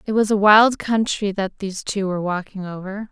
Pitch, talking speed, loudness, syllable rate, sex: 200 Hz, 210 wpm, -19 LUFS, 5.3 syllables/s, female